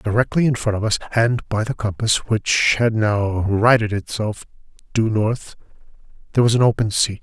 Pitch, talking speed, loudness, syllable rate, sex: 110 Hz, 175 wpm, -19 LUFS, 4.9 syllables/s, male